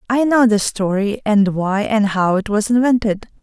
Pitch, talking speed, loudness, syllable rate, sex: 215 Hz, 195 wpm, -16 LUFS, 4.5 syllables/s, female